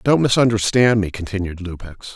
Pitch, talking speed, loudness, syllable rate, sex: 105 Hz, 140 wpm, -18 LUFS, 5.9 syllables/s, male